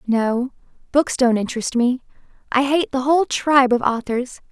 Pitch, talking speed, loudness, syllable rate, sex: 260 Hz, 160 wpm, -19 LUFS, 4.9 syllables/s, female